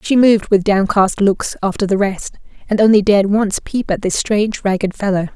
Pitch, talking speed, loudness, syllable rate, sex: 200 Hz, 200 wpm, -15 LUFS, 5.5 syllables/s, female